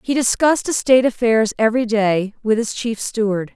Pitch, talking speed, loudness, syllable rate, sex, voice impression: 230 Hz, 170 wpm, -17 LUFS, 5.4 syllables/s, female, feminine, adult-like, slightly clear, slightly cute, slightly refreshing, slightly friendly